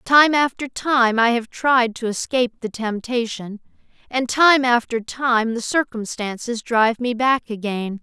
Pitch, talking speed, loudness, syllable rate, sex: 240 Hz, 150 wpm, -19 LUFS, 4.2 syllables/s, female